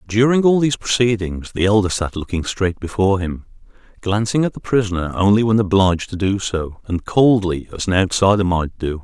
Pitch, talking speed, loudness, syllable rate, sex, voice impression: 100 Hz, 185 wpm, -18 LUFS, 5.5 syllables/s, male, masculine, adult-like, thick, slightly weak, clear, cool, sincere, calm, reassuring, slightly wild, kind, modest